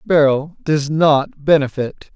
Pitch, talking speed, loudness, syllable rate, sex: 145 Hz, 110 wpm, -16 LUFS, 3.8 syllables/s, male